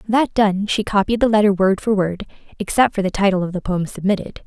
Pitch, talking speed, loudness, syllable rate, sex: 200 Hz, 215 wpm, -18 LUFS, 5.7 syllables/s, female